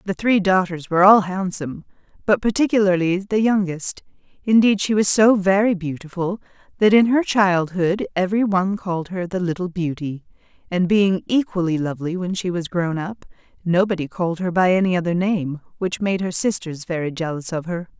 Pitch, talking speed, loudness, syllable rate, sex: 185 Hz, 170 wpm, -20 LUFS, 5.4 syllables/s, female